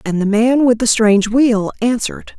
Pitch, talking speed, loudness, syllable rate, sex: 225 Hz, 200 wpm, -14 LUFS, 5.1 syllables/s, female